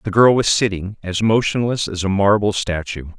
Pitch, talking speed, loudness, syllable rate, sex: 100 Hz, 190 wpm, -18 LUFS, 5.0 syllables/s, male